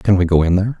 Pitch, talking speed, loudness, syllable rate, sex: 95 Hz, 375 wpm, -15 LUFS, 8.0 syllables/s, male